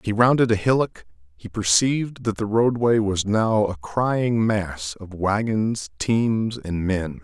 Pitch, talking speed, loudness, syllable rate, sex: 105 Hz, 165 wpm, -22 LUFS, 3.8 syllables/s, male